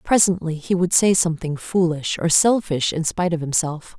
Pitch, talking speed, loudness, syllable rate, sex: 170 Hz, 180 wpm, -19 LUFS, 5.2 syllables/s, female